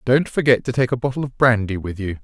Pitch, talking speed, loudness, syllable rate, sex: 120 Hz, 270 wpm, -19 LUFS, 6.1 syllables/s, male